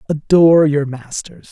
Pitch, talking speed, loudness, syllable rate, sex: 150 Hz, 120 wpm, -13 LUFS, 4.6 syllables/s, male